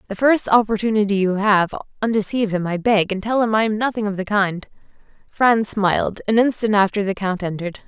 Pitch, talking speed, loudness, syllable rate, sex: 210 Hz, 200 wpm, -19 LUFS, 5.8 syllables/s, female